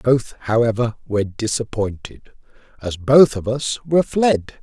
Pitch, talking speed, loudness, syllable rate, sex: 120 Hz, 130 wpm, -19 LUFS, 4.6 syllables/s, male